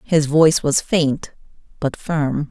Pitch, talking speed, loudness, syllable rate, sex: 150 Hz, 145 wpm, -18 LUFS, 3.6 syllables/s, female